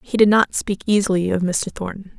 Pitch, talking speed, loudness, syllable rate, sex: 195 Hz, 220 wpm, -19 LUFS, 5.4 syllables/s, female